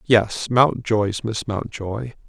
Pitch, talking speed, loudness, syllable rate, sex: 110 Hz, 105 wpm, -21 LUFS, 2.9 syllables/s, male